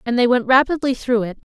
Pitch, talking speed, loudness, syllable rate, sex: 240 Hz, 240 wpm, -17 LUFS, 6.2 syllables/s, female